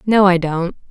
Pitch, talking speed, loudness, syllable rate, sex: 180 Hz, 200 wpm, -16 LUFS, 4.5 syllables/s, female